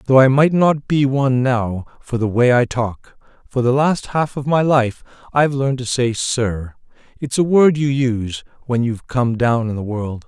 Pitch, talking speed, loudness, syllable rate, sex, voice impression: 125 Hz, 210 wpm, -17 LUFS, 4.6 syllables/s, male, very masculine, very middle-aged, very thick, slightly relaxed, slightly weak, dark, very soft, slightly muffled, fluent, slightly raspy, cool, intellectual, refreshing, slightly sincere, calm, mature, very friendly, very reassuring, unique, elegant, slightly wild, sweet, lively, kind, modest